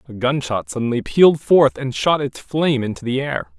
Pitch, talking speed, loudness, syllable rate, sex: 130 Hz, 200 wpm, -18 LUFS, 5.3 syllables/s, male